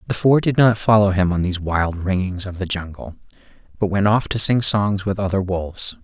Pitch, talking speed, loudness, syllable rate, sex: 100 Hz, 220 wpm, -19 LUFS, 5.4 syllables/s, male